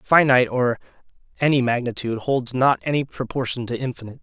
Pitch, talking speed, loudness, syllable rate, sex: 125 Hz, 140 wpm, -21 LUFS, 6.4 syllables/s, male